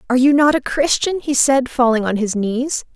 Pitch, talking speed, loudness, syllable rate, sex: 260 Hz, 225 wpm, -16 LUFS, 5.2 syllables/s, female